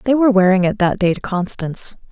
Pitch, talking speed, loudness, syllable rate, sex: 195 Hz, 225 wpm, -16 LUFS, 6.5 syllables/s, female